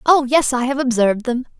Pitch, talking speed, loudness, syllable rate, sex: 255 Hz, 225 wpm, -17 LUFS, 5.8 syllables/s, female